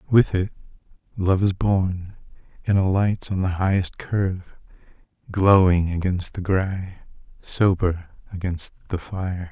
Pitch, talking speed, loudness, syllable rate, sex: 95 Hz, 120 wpm, -22 LUFS, 4.1 syllables/s, male